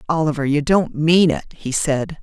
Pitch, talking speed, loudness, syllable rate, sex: 155 Hz, 190 wpm, -18 LUFS, 4.5 syllables/s, female